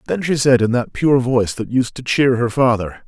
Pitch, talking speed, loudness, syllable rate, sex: 120 Hz, 255 wpm, -17 LUFS, 5.4 syllables/s, male